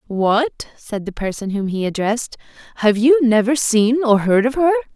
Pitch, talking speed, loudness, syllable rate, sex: 235 Hz, 180 wpm, -17 LUFS, 4.8 syllables/s, female